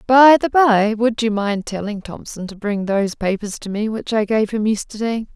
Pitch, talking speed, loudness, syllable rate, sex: 215 Hz, 215 wpm, -18 LUFS, 4.9 syllables/s, female